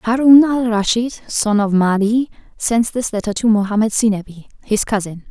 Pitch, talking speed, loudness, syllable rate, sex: 220 Hz, 160 wpm, -16 LUFS, 4.8 syllables/s, female